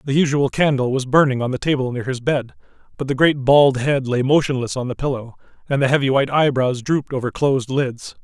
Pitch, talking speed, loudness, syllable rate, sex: 135 Hz, 220 wpm, -19 LUFS, 5.9 syllables/s, male